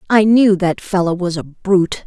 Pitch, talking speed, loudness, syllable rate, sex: 185 Hz, 205 wpm, -15 LUFS, 4.8 syllables/s, female